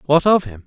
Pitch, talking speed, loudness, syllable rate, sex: 150 Hz, 270 wpm, -16 LUFS, 5.7 syllables/s, male